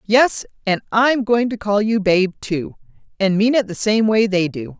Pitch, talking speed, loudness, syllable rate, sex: 205 Hz, 215 wpm, -18 LUFS, 4.4 syllables/s, female